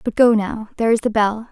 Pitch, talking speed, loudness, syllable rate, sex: 220 Hz, 280 wpm, -18 LUFS, 6.1 syllables/s, female